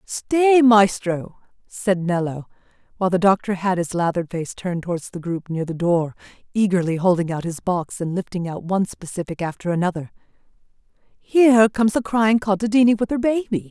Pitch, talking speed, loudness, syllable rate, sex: 190 Hz, 165 wpm, -20 LUFS, 5.4 syllables/s, female